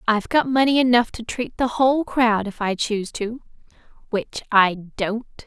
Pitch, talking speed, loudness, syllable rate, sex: 230 Hz, 175 wpm, -21 LUFS, 4.8 syllables/s, female